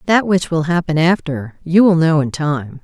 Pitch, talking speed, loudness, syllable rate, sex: 160 Hz, 210 wpm, -16 LUFS, 4.6 syllables/s, female